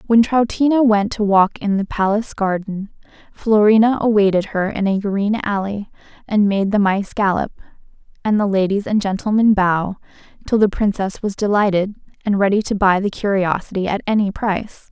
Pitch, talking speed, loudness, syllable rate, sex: 205 Hz, 165 wpm, -17 LUFS, 5.2 syllables/s, female